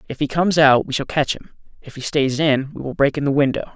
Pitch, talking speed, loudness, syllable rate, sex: 140 Hz, 290 wpm, -19 LUFS, 6.3 syllables/s, male